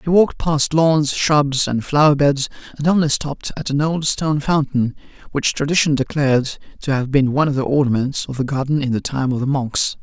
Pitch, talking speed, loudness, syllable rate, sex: 140 Hz, 210 wpm, -18 LUFS, 5.4 syllables/s, male